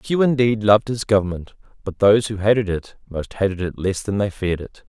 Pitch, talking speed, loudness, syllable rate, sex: 105 Hz, 220 wpm, -20 LUFS, 5.8 syllables/s, male